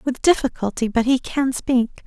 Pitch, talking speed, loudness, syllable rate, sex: 250 Hz, 175 wpm, -20 LUFS, 4.6 syllables/s, female